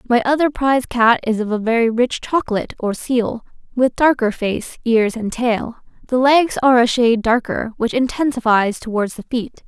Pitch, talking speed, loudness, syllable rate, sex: 240 Hz, 180 wpm, -17 LUFS, 5.0 syllables/s, female